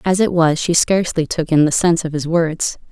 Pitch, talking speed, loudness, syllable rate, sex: 165 Hz, 245 wpm, -16 LUFS, 5.5 syllables/s, female